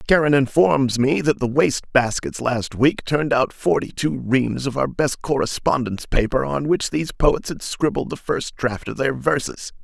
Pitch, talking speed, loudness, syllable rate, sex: 135 Hz, 190 wpm, -20 LUFS, 4.7 syllables/s, male